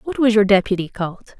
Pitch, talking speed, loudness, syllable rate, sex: 210 Hz, 215 wpm, -18 LUFS, 6.8 syllables/s, female